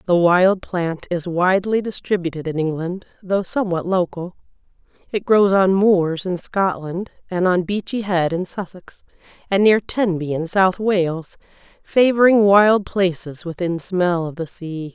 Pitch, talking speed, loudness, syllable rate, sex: 185 Hz, 150 wpm, -19 LUFS, 4.2 syllables/s, female